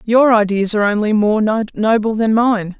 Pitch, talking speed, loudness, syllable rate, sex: 215 Hz, 170 wpm, -15 LUFS, 4.7 syllables/s, female